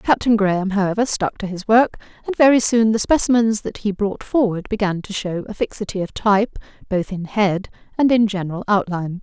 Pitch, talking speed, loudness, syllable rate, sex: 210 Hz, 195 wpm, -19 LUFS, 5.6 syllables/s, female